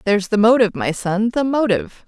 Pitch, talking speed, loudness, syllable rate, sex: 220 Hz, 200 wpm, -17 LUFS, 6.3 syllables/s, female